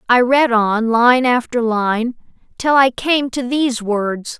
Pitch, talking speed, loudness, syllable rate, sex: 240 Hz, 165 wpm, -16 LUFS, 3.7 syllables/s, female